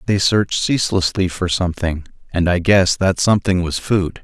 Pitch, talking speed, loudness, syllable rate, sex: 90 Hz, 170 wpm, -17 LUFS, 5.5 syllables/s, male